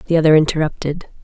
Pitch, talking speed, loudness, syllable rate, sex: 155 Hz, 145 wpm, -16 LUFS, 6.4 syllables/s, female